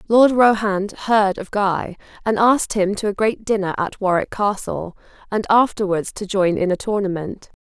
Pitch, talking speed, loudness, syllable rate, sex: 200 Hz, 175 wpm, -19 LUFS, 4.6 syllables/s, female